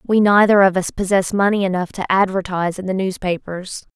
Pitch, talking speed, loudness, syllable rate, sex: 190 Hz, 180 wpm, -17 LUFS, 5.8 syllables/s, female